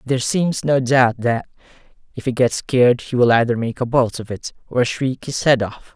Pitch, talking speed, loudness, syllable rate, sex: 125 Hz, 220 wpm, -18 LUFS, 5.0 syllables/s, male